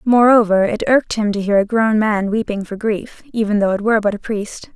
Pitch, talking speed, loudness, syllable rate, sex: 215 Hz, 240 wpm, -16 LUFS, 5.5 syllables/s, female